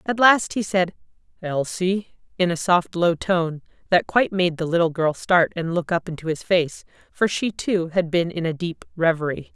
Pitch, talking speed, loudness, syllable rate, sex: 175 Hz, 200 wpm, -22 LUFS, 4.7 syllables/s, female